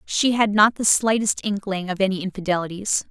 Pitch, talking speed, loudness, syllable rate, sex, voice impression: 200 Hz, 175 wpm, -21 LUFS, 5.4 syllables/s, female, feminine, adult-like, slightly clear, sincere, slightly friendly